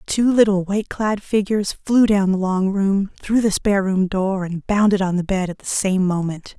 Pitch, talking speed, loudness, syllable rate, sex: 195 Hz, 230 wpm, -19 LUFS, 5.1 syllables/s, female